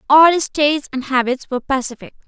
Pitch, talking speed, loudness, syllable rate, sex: 275 Hz, 185 wpm, -17 LUFS, 6.1 syllables/s, female